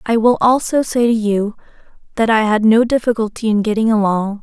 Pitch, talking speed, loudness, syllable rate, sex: 220 Hz, 190 wpm, -15 LUFS, 5.4 syllables/s, female